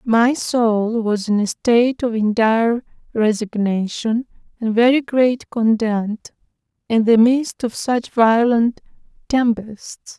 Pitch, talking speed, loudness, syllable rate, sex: 230 Hz, 120 wpm, -18 LUFS, 3.4 syllables/s, female